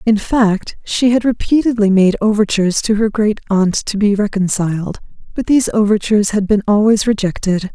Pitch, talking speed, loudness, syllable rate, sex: 210 Hz, 165 wpm, -15 LUFS, 5.3 syllables/s, female